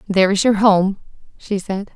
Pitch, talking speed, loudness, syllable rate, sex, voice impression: 195 Hz, 185 wpm, -17 LUFS, 4.9 syllables/s, female, feminine, slightly young, tensed, bright, soft, slightly halting, slightly cute, calm, friendly, unique, slightly sweet, kind, slightly modest